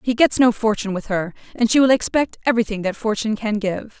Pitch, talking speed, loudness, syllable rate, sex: 220 Hz, 225 wpm, -19 LUFS, 6.3 syllables/s, female